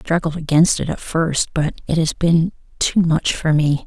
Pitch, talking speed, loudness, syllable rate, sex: 160 Hz, 215 wpm, -18 LUFS, 5.0 syllables/s, female